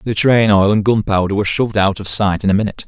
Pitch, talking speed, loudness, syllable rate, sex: 105 Hz, 270 wpm, -15 LUFS, 6.9 syllables/s, male